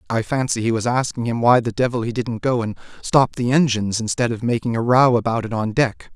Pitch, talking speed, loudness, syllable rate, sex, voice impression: 120 Hz, 245 wpm, -19 LUFS, 5.8 syllables/s, male, masculine, adult-like, tensed, slightly bright, clear, fluent, intellectual, sincere, friendly, lively, kind, slightly strict